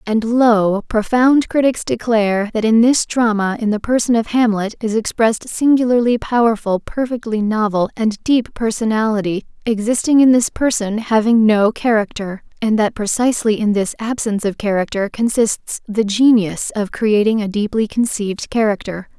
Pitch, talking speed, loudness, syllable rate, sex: 220 Hz, 145 wpm, -16 LUFS, 4.9 syllables/s, female